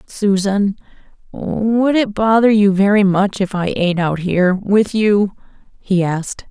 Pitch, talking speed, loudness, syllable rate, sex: 200 Hz, 140 wpm, -15 LUFS, 4.1 syllables/s, female